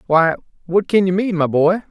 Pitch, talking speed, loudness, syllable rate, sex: 180 Hz, 220 wpm, -17 LUFS, 5.0 syllables/s, male